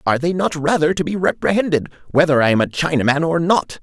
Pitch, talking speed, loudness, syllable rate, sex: 160 Hz, 220 wpm, -17 LUFS, 6.3 syllables/s, male